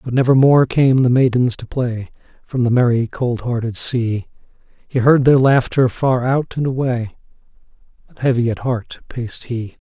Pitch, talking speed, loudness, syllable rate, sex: 125 Hz, 170 wpm, -17 LUFS, 4.6 syllables/s, male